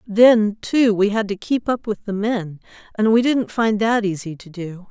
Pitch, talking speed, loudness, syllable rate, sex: 210 Hz, 220 wpm, -19 LUFS, 4.4 syllables/s, female